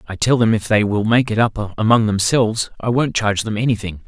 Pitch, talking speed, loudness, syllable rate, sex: 110 Hz, 235 wpm, -17 LUFS, 5.8 syllables/s, male